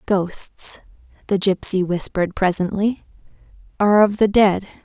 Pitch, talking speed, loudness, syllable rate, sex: 195 Hz, 110 wpm, -19 LUFS, 4.5 syllables/s, female